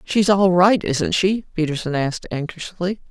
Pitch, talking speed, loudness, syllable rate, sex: 170 Hz, 155 wpm, -19 LUFS, 4.6 syllables/s, female